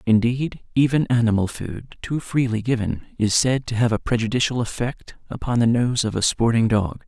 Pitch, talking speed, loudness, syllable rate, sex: 115 Hz, 180 wpm, -21 LUFS, 5.0 syllables/s, male